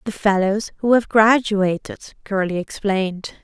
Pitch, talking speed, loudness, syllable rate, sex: 205 Hz, 120 wpm, -19 LUFS, 4.6 syllables/s, female